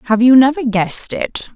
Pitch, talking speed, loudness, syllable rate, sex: 245 Hz, 195 wpm, -14 LUFS, 5.3 syllables/s, female